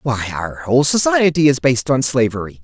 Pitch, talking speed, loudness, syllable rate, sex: 130 Hz, 180 wpm, -16 LUFS, 5.9 syllables/s, male